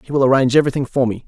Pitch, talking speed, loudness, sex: 130 Hz, 280 wpm, -16 LUFS, male